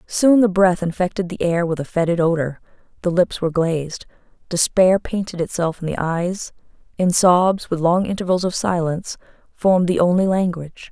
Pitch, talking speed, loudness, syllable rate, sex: 175 Hz, 170 wpm, -19 LUFS, 5.3 syllables/s, female